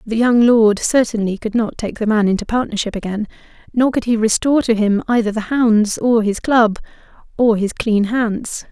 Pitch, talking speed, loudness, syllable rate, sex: 220 Hz, 185 wpm, -16 LUFS, 5.0 syllables/s, female